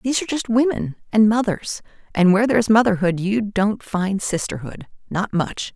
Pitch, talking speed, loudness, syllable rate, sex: 210 Hz, 155 wpm, -20 LUFS, 5.2 syllables/s, female